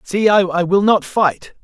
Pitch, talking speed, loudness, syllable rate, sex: 190 Hz, 185 wpm, -15 LUFS, 3.4 syllables/s, male